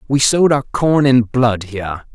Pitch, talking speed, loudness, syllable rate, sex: 125 Hz, 195 wpm, -15 LUFS, 4.8 syllables/s, male